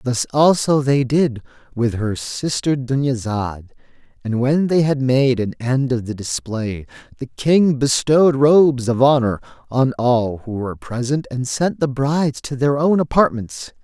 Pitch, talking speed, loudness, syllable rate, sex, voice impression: 130 Hz, 160 wpm, -18 LUFS, 4.3 syllables/s, male, very masculine, very adult-like, middle-aged, very thick, relaxed, slightly powerful, slightly bright, soft, slightly clear, slightly fluent, very cool, very intellectual, slightly refreshing, very sincere, very calm, very mature, very friendly, reassuring, unique, very elegant, sweet, very kind